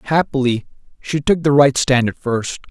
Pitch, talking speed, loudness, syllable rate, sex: 135 Hz, 175 wpm, -17 LUFS, 4.7 syllables/s, male